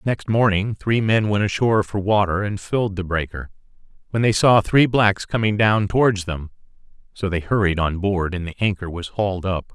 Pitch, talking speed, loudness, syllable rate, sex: 100 Hz, 195 wpm, -20 LUFS, 5.2 syllables/s, male